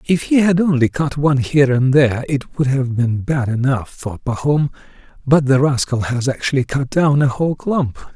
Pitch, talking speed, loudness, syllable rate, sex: 135 Hz, 200 wpm, -17 LUFS, 5.0 syllables/s, male